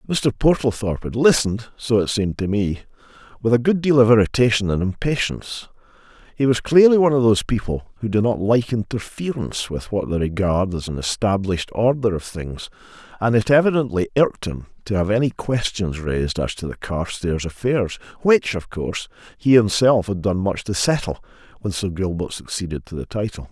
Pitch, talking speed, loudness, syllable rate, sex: 105 Hz, 175 wpm, -20 LUFS, 5.5 syllables/s, male